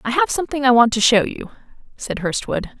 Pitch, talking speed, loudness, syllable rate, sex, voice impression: 245 Hz, 215 wpm, -18 LUFS, 5.8 syllables/s, female, very feminine, slightly young, thin, very tensed, powerful, very bright, hard, very clear, fluent, slightly cute, cool, intellectual, very refreshing, slightly sincere, calm, friendly, reassuring, slightly unique, slightly elegant, wild, slightly sweet, lively, strict, intense